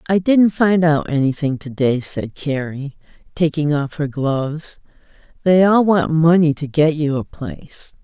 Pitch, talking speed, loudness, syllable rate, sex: 155 Hz, 165 wpm, -17 LUFS, 4.3 syllables/s, female